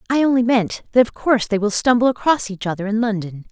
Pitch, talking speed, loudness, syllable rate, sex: 225 Hz, 240 wpm, -18 LUFS, 6.3 syllables/s, female